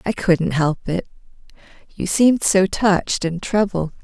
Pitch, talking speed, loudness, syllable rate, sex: 185 Hz, 150 wpm, -19 LUFS, 4.3 syllables/s, female